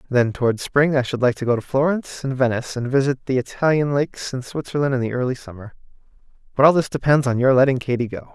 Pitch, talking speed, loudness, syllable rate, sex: 130 Hz, 230 wpm, -20 LUFS, 6.5 syllables/s, male